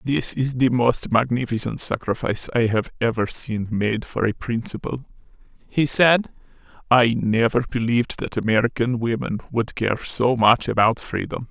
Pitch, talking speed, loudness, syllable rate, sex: 120 Hz, 145 wpm, -21 LUFS, 4.7 syllables/s, female